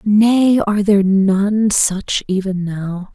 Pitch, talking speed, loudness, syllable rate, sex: 200 Hz, 135 wpm, -15 LUFS, 3.3 syllables/s, female